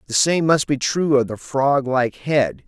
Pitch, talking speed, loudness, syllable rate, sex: 140 Hz, 200 wpm, -19 LUFS, 4.5 syllables/s, male